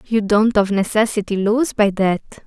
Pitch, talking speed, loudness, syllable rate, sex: 210 Hz, 170 wpm, -17 LUFS, 4.7 syllables/s, female